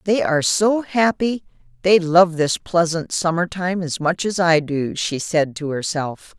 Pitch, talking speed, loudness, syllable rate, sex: 170 Hz, 180 wpm, -19 LUFS, 4.1 syllables/s, female